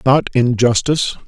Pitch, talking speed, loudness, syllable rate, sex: 130 Hz, 140 wpm, -15 LUFS, 5.0 syllables/s, male